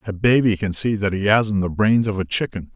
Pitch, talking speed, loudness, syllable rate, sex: 105 Hz, 260 wpm, -19 LUFS, 5.4 syllables/s, male